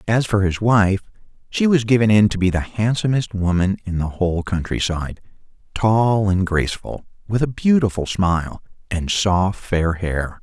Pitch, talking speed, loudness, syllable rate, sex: 100 Hz, 155 wpm, -19 LUFS, 4.7 syllables/s, male